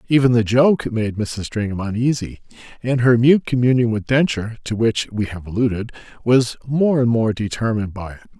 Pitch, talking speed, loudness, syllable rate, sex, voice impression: 115 Hz, 180 wpm, -19 LUFS, 5.2 syllables/s, male, very masculine, very adult-like, very middle-aged, very thick, tensed, slightly bright, very soft, clear, fluent, cool, very intellectual, very sincere, very calm, mature, friendly, very reassuring, elegant, sweet, slightly lively, very kind